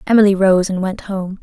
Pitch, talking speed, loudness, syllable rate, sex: 195 Hz, 210 wpm, -15 LUFS, 5.3 syllables/s, female